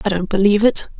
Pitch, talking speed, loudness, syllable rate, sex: 200 Hz, 240 wpm, -16 LUFS, 7.2 syllables/s, female